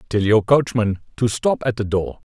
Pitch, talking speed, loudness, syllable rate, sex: 115 Hz, 210 wpm, -19 LUFS, 4.7 syllables/s, male